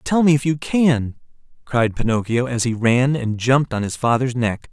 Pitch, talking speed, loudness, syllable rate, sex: 125 Hz, 205 wpm, -19 LUFS, 4.8 syllables/s, male